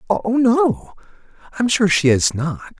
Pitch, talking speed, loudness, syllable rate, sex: 170 Hz, 150 wpm, -17 LUFS, 3.9 syllables/s, male